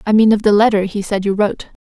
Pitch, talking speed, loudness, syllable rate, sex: 205 Hz, 295 wpm, -15 LUFS, 6.8 syllables/s, female